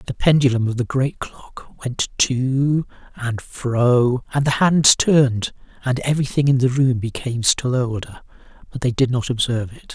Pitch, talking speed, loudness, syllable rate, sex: 125 Hz, 170 wpm, -19 LUFS, 4.5 syllables/s, male